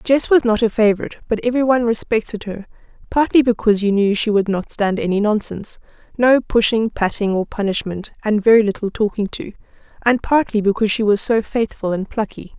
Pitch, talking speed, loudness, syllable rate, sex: 215 Hz, 170 wpm, -18 LUFS, 6.0 syllables/s, female